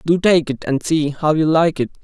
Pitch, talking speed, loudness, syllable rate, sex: 155 Hz, 265 wpm, -17 LUFS, 5.0 syllables/s, male